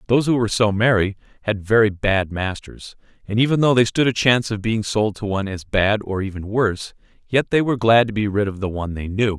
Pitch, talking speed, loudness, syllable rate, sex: 105 Hz, 245 wpm, -19 LUFS, 6.0 syllables/s, male